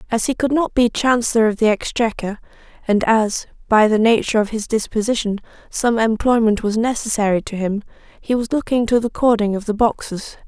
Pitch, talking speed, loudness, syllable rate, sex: 225 Hz, 185 wpm, -18 LUFS, 5.5 syllables/s, female